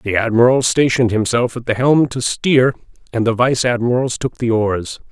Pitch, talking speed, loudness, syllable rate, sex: 120 Hz, 190 wpm, -16 LUFS, 5.0 syllables/s, male